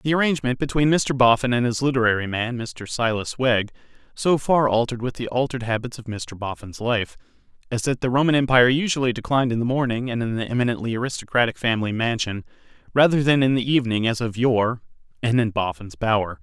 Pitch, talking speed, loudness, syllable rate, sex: 120 Hz, 190 wpm, -22 LUFS, 6.3 syllables/s, male